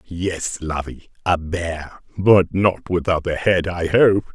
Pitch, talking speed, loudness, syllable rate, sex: 90 Hz, 150 wpm, -19 LUFS, 3.5 syllables/s, male